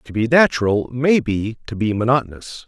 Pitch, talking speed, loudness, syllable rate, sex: 120 Hz, 180 wpm, -18 LUFS, 5.2 syllables/s, male